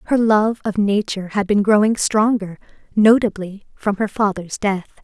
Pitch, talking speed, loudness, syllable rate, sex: 205 Hz, 155 wpm, -18 LUFS, 4.8 syllables/s, female